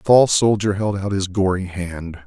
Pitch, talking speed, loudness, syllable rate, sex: 95 Hz, 210 wpm, -19 LUFS, 4.9 syllables/s, male